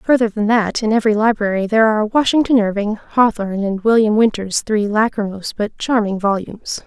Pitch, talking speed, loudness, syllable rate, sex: 215 Hz, 165 wpm, -17 LUFS, 5.7 syllables/s, female